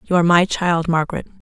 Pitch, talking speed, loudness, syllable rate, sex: 175 Hz, 205 wpm, -17 LUFS, 6.7 syllables/s, female